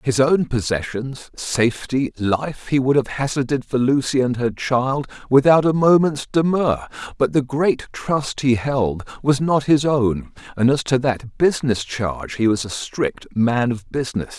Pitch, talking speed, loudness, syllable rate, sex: 130 Hz, 170 wpm, -19 LUFS, 4.3 syllables/s, male